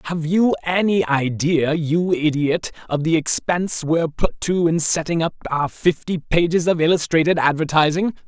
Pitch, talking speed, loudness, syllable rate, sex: 165 Hz, 150 wpm, -19 LUFS, 4.8 syllables/s, male